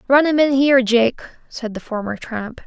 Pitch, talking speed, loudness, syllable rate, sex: 245 Hz, 205 wpm, -18 LUFS, 5.0 syllables/s, female